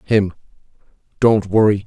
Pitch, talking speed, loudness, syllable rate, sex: 105 Hz, 95 wpm, -16 LUFS, 4.3 syllables/s, male